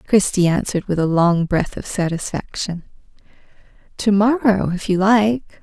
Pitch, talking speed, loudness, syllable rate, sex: 195 Hz, 140 wpm, -18 LUFS, 4.6 syllables/s, female